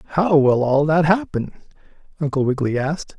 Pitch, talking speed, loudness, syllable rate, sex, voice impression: 150 Hz, 150 wpm, -19 LUFS, 6.1 syllables/s, male, masculine, slightly gender-neutral, slightly young, slightly adult-like, slightly thick, slightly tensed, weak, bright, slightly hard, clear, slightly fluent, cool, intellectual, very refreshing, very sincere, calm, friendly, reassuring, slightly unique, elegant, slightly wild, slightly sweet, slightly lively, kind, very modest